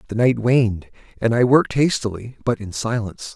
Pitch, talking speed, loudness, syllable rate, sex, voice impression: 115 Hz, 180 wpm, -20 LUFS, 5.7 syllables/s, male, very masculine, very adult-like, very thick, tensed, powerful, slightly bright, soft, clear, fluent, slightly raspy, cool, very intellectual, refreshing, sincere, very calm, mature, friendly, reassuring, unique, slightly elegant, wild, slightly sweet, lively, kind, slightly intense